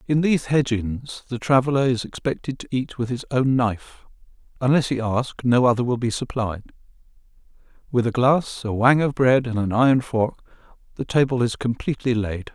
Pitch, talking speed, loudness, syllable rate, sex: 125 Hz, 180 wpm, -21 LUFS, 5.4 syllables/s, male